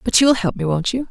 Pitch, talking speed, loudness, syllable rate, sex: 215 Hz, 325 wpm, -18 LUFS, 5.9 syllables/s, female